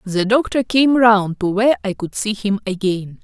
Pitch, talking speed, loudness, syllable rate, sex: 210 Hz, 205 wpm, -17 LUFS, 4.7 syllables/s, female